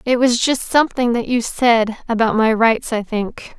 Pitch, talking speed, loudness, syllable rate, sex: 235 Hz, 185 wpm, -17 LUFS, 4.5 syllables/s, female